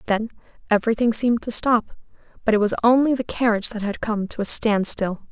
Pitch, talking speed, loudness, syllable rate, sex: 220 Hz, 190 wpm, -20 LUFS, 6.1 syllables/s, female